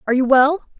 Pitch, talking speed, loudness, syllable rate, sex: 275 Hz, 225 wpm, -15 LUFS, 8.3 syllables/s, female